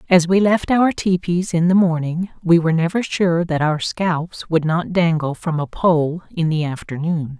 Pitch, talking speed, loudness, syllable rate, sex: 170 Hz, 195 wpm, -18 LUFS, 4.5 syllables/s, female